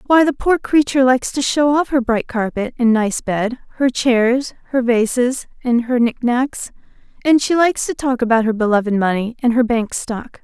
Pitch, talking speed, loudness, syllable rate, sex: 245 Hz, 200 wpm, -17 LUFS, 4.9 syllables/s, female